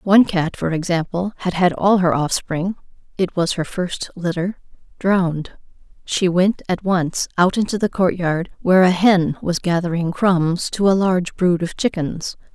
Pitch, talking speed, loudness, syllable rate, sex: 180 Hz, 165 wpm, -19 LUFS, 4.6 syllables/s, female